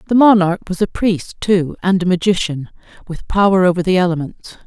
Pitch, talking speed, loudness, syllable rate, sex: 185 Hz, 180 wpm, -15 LUFS, 5.4 syllables/s, female